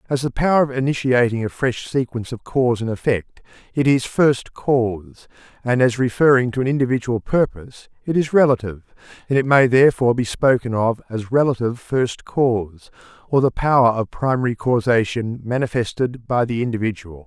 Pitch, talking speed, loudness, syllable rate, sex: 120 Hz, 165 wpm, -19 LUFS, 5.5 syllables/s, male